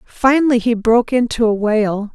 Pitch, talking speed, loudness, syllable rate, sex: 230 Hz, 170 wpm, -15 LUFS, 4.9 syllables/s, female